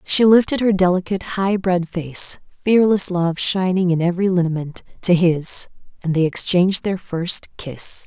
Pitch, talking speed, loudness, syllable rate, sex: 180 Hz, 155 wpm, -18 LUFS, 4.6 syllables/s, female